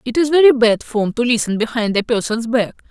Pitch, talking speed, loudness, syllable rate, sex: 235 Hz, 230 wpm, -16 LUFS, 5.6 syllables/s, female